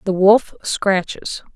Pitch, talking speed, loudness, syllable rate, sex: 195 Hz, 115 wpm, -17 LUFS, 3.2 syllables/s, female